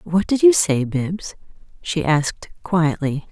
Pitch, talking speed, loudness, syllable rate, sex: 170 Hz, 145 wpm, -19 LUFS, 3.8 syllables/s, female